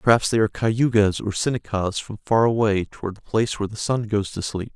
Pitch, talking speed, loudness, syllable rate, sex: 105 Hz, 225 wpm, -22 LUFS, 6.0 syllables/s, male